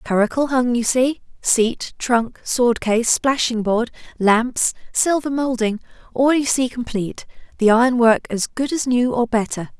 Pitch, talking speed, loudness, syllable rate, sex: 240 Hz, 160 wpm, -19 LUFS, 4.3 syllables/s, female